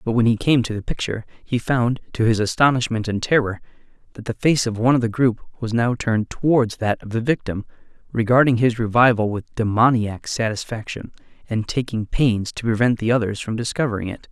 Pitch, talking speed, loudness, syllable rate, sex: 115 Hz, 195 wpm, -20 LUFS, 5.7 syllables/s, male